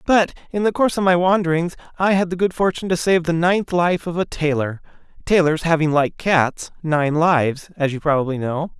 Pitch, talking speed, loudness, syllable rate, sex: 165 Hz, 200 wpm, -19 LUFS, 5.3 syllables/s, male